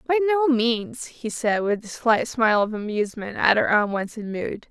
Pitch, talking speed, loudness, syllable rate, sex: 230 Hz, 190 wpm, -22 LUFS, 4.8 syllables/s, female